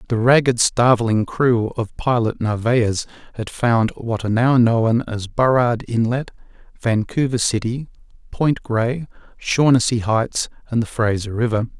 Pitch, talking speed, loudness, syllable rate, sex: 120 Hz, 130 wpm, -19 LUFS, 4.2 syllables/s, male